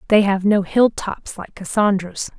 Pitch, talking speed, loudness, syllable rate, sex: 200 Hz, 150 wpm, -18 LUFS, 4.2 syllables/s, female